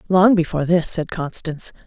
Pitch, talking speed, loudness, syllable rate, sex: 170 Hz, 160 wpm, -19 LUFS, 5.7 syllables/s, female